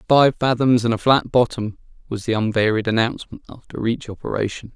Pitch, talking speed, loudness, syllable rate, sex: 115 Hz, 165 wpm, -20 LUFS, 5.7 syllables/s, male